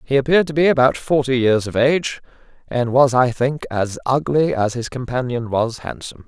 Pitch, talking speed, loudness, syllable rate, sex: 130 Hz, 190 wpm, -18 LUFS, 5.4 syllables/s, male